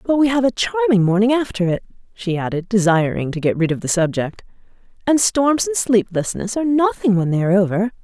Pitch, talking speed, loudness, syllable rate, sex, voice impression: 210 Hz, 200 wpm, -18 LUFS, 5.8 syllables/s, female, very feminine, adult-like, slightly middle-aged, slightly thin, tensed, slightly weak, slightly dark, slightly soft, slightly muffled, fluent, slightly cool, very intellectual, refreshing, sincere, slightly calm, slightly friendly, slightly reassuring, unique, elegant, slightly wild, slightly sweet, lively, slightly strict, slightly intense, slightly sharp